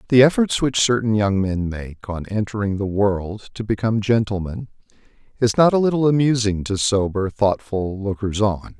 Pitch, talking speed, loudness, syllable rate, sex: 105 Hz, 165 wpm, -20 LUFS, 4.9 syllables/s, male